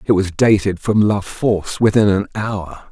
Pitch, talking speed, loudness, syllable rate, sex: 100 Hz, 185 wpm, -17 LUFS, 4.5 syllables/s, male